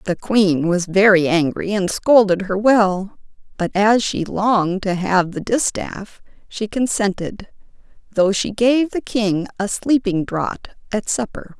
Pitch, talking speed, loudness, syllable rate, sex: 200 Hz, 150 wpm, -18 LUFS, 3.8 syllables/s, female